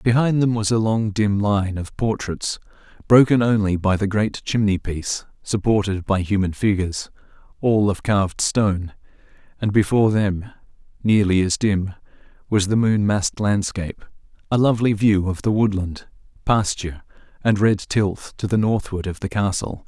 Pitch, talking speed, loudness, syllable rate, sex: 105 Hz, 150 wpm, -20 LUFS, 4.8 syllables/s, male